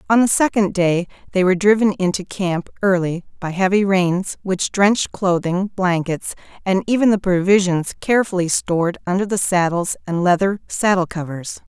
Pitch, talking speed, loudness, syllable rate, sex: 185 Hz, 155 wpm, -18 LUFS, 5.0 syllables/s, female